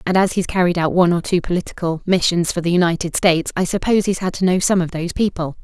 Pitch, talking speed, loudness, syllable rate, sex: 175 Hz, 255 wpm, -18 LUFS, 6.8 syllables/s, female